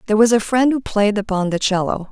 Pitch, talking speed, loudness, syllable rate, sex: 210 Hz, 255 wpm, -17 LUFS, 6.3 syllables/s, female